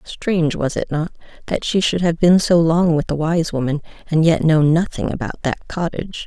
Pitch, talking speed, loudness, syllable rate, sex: 160 Hz, 210 wpm, -18 LUFS, 5.2 syllables/s, female